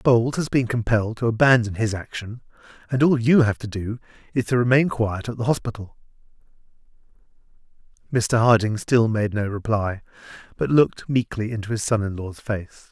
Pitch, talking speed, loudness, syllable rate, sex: 115 Hz, 165 wpm, -22 LUFS, 5.3 syllables/s, male